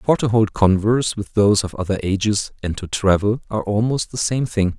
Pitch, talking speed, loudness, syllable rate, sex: 105 Hz, 215 wpm, -19 LUFS, 5.5 syllables/s, male